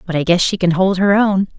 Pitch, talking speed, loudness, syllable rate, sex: 185 Hz, 305 wpm, -15 LUFS, 5.8 syllables/s, female